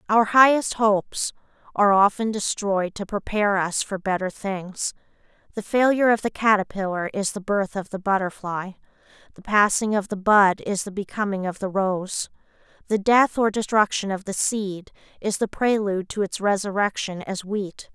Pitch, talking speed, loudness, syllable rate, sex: 200 Hz, 165 wpm, -22 LUFS, 4.9 syllables/s, female